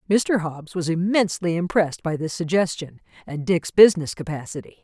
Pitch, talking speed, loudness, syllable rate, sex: 170 Hz, 150 wpm, -21 LUFS, 5.5 syllables/s, female